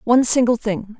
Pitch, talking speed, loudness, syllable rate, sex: 230 Hz, 180 wpm, -17 LUFS, 5.6 syllables/s, female